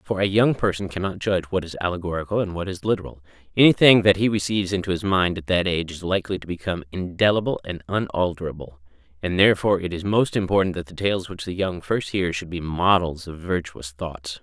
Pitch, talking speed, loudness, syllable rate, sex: 90 Hz, 210 wpm, -22 LUFS, 6.2 syllables/s, male